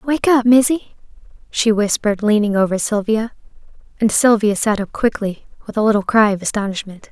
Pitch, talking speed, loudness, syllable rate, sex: 215 Hz, 160 wpm, -17 LUFS, 5.5 syllables/s, female